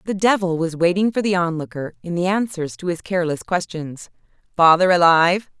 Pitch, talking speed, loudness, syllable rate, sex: 175 Hz, 160 wpm, -19 LUFS, 5.7 syllables/s, female